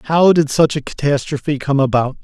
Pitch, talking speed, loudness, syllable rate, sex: 145 Hz, 190 wpm, -16 LUFS, 5.5 syllables/s, male